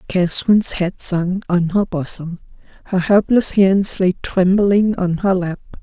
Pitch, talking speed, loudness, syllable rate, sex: 185 Hz, 145 wpm, -17 LUFS, 4.1 syllables/s, female